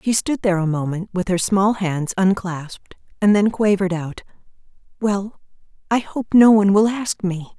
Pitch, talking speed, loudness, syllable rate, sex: 195 Hz, 175 wpm, -19 LUFS, 4.9 syllables/s, female